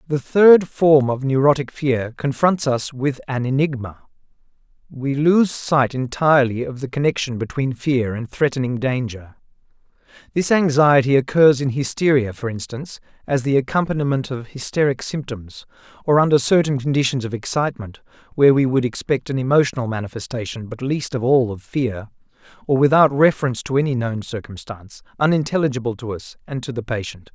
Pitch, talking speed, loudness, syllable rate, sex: 130 Hz, 150 wpm, -19 LUFS, 5.5 syllables/s, male